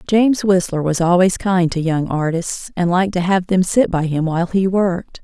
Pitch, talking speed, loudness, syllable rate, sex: 180 Hz, 220 wpm, -17 LUFS, 5.2 syllables/s, female